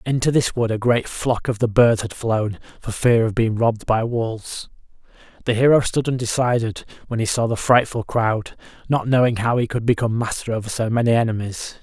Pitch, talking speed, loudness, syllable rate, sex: 115 Hz, 200 wpm, -20 LUFS, 5.4 syllables/s, male